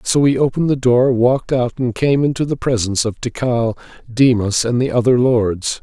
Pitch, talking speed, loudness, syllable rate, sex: 125 Hz, 195 wpm, -16 LUFS, 5.2 syllables/s, male